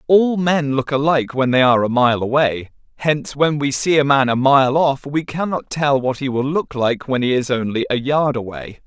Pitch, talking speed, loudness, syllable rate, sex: 135 Hz, 230 wpm, -17 LUFS, 5.0 syllables/s, male